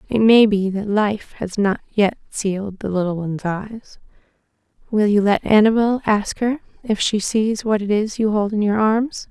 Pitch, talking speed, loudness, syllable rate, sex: 210 Hz, 195 wpm, -19 LUFS, 4.6 syllables/s, female